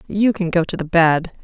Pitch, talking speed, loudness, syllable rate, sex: 175 Hz, 250 wpm, -17 LUFS, 5.1 syllables/s, female